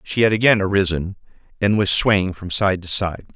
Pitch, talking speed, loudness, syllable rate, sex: 100 Hz, 195 wpm, -19 LUFS, 5.1 syllables/s, male